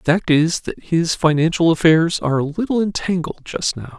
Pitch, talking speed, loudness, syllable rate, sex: 165 Hz, 195 wpm, -18 LUFS, 5.3 syllables/s, male